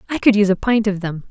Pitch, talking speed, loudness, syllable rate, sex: 205 Hz, 325 wpm, -17 LUFS, 7.6 syllables/s, female